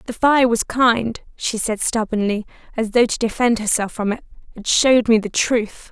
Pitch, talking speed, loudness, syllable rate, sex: 225 Hz, 195 wpm, -18 LUFS, 4.8 syllables/s, female